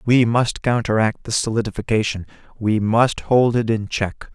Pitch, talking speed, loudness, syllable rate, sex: 115 Hz, 150 wpm, -19 LUFS, 4.6 syllables/s, male